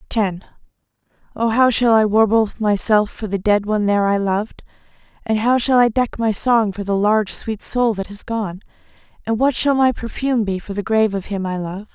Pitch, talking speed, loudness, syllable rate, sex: 215 Hz, 210 wpm, -18 LUFS, 5.4 syllables/s, female